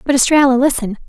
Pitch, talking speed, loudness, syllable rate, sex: 260 Hz, 165 wpm, -13 LUFS, 6.6 syllables/s, female